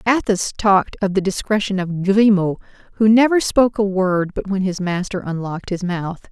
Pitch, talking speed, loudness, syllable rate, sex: 195 Hz, 180 wpm, -18 LUFS, 5.2 syllables/s, female